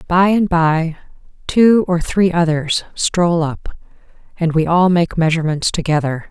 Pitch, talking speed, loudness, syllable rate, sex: 170 Hz, 145 wpm, -16 LUFS, 4.3 syllables/s, female